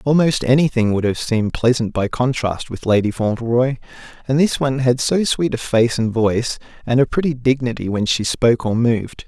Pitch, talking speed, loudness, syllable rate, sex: 120 Hz, 195 wpm, -18 LUFS, 5.5 syllables/s, male